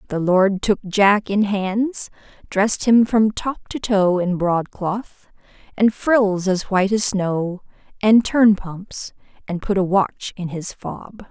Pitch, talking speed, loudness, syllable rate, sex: 200 Hz, 155 wpm, -19 LUFS, 3.5 syllables/s, female